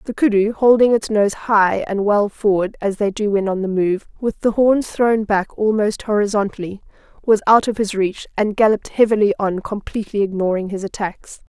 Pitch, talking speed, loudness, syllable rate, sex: 205 Hz, 190 wpm, -18 LUFS, 5.1 syllables/s, female